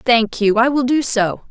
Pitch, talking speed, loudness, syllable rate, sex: 240 Hz, 240 wpm, -16 LUFS, 4.4 syllables/s, female